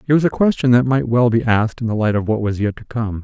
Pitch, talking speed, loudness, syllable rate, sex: 115 Hz, 335 wpm, -17 LUFS, 6.5 syllables/s, male